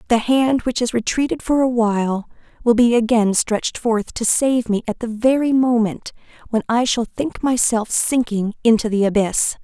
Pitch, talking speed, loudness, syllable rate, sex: 230 Hz, 180 wpm, -18 LUFS, 4.7 syllables/s, female